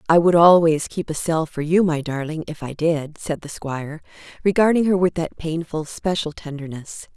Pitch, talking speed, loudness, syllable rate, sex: 160 Hz, 195 wpm, -20 LUFS, 5.0 syllables/s, female